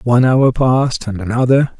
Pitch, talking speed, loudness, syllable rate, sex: 125 Hz, 170 wpm, -14 LUFS, 5.4 syllables/s, male